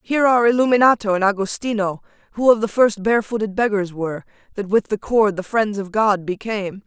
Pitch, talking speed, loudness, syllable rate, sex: 210 Hz, 185 wpm, -19 LUFS, 6.1 syllables/s, female